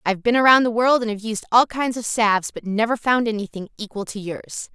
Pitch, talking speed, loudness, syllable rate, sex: 225 Hz, 255 wpm, -20 LUFS, 5.9 syllables/s, female